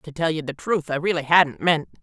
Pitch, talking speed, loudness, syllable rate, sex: 155 Hz, 265 wpm, -21 LUFS, 5.4 syllables/s, female